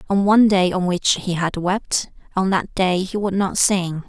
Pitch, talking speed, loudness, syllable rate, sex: 190 Hz, 220 wpm, -19 LUFS, 4.4 syllables/s, female